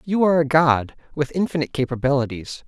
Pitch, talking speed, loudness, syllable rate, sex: 145 Hz, 155 wpm, -20 LUFS, 6.3 syllables/s, male